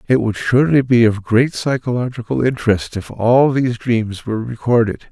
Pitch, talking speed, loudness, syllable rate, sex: 115 Hz, 165 wpm, -16 LUFS, 5.3 syllables/s, male